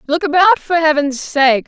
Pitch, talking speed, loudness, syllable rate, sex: 305 Hz, 180 wpm, -13 LUFS, 4.5 syllables/s, female